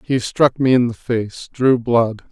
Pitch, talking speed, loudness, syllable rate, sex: 120 Hz, 205 wpm, -17 LUFS, 3.9 syllables/s, male